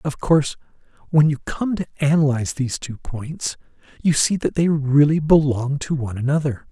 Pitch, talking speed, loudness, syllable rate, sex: 145 Hz, 170 wpm, -20 LUFS, 5.3 syllables/s, male